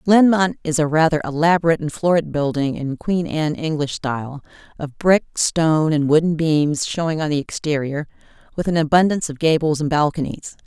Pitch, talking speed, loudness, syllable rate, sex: 155 Hz, 170 wpm, -19 LUFS, 5.5 syllables/s, female